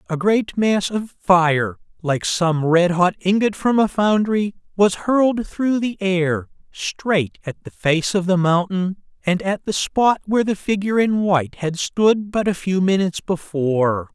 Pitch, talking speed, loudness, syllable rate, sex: 185 Hz, 175 wpm, -19 LUFS, 4.1 syllables/s, male